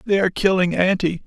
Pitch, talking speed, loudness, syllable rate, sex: 185 Hz, 190 wpm, -19 LUFS, 6.1 syllables/s, male